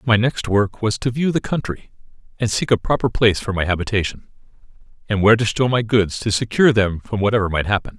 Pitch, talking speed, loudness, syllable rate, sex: 110 Hz, 220 wpm, -19 LUFS, 6.2 syllables/s, male